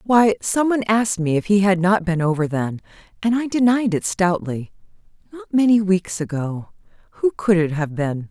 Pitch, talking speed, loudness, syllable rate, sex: 190 Hz, 175 wpm, -19 LUFS, 5.1 syllables/s, female